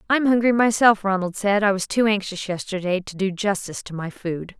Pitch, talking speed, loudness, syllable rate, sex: 200 Hz, 220 wpm, -21 LUFS, 5.7 syllables/s, female